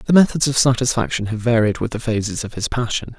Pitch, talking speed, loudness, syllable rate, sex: 120 Hz, 225 wpm, -19 LUFS, 6.0 syllables/s, male